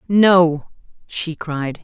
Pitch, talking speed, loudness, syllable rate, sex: 170 Hz, 100 wpm, -17 LUFS, 2.3 syllables/s, female